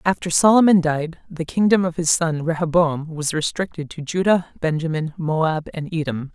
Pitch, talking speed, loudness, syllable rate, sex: 165 Hz, 160 wpm, -20 LUFS, 4.8 syllables/s, female